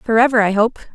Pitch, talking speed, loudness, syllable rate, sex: 225 Hz, 190 wpm, -15 LUFS, 5.6 syllables/s, female